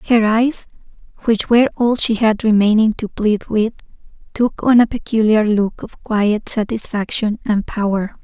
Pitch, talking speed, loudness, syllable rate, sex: 220 Hz, 155 wpm, -16 LUFS, 4.3 syllables/s, female